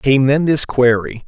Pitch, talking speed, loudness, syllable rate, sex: 130 Hz, 190 wpm, -15 LUFS, 4.1 syllables/s, male